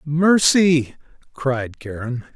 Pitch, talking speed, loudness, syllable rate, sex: 145 Hz, 75 wpm, -19 LUFS, 2.7 syllables/s, male